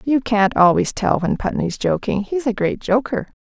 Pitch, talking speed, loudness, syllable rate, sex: 220 Hz, 190 wpm, -19 LUFS, 4.7 syllables/s, female